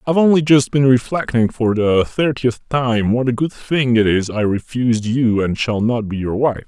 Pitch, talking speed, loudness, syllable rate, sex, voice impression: 120 Hz, 215 wpm, -17 LUFS, 4.8 syllables/s, male, very masculine, very adult-like, very middle-aged, very thick, tensed, very powerful, bright, hard, muffled, slightly fluent, cool, very intellectual, sincere, very calm, very mature, friendly, very reassuring, elegant, lively, kind, intense